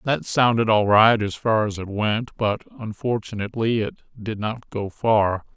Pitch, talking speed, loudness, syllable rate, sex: 110 Hz, 175 wpm, -22 LUFS, 4.4 syllables/s, male